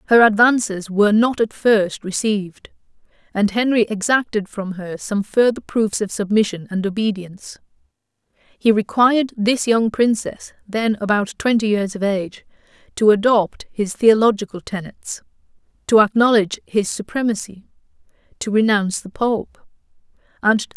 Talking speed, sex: 155 wpm, female